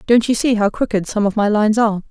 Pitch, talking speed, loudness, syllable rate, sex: 215 Hz, 285 wpm, -16 LUFS, 6.8 syllables/s, female